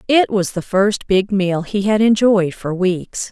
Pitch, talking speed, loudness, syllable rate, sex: 200 Hz, 200 wpm, -17 LUFS, 3.8 syllables/s, female